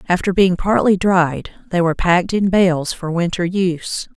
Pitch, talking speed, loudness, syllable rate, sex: 180 Hz, 170 wpm, -17 LUFS, 4.7 syllables/s, female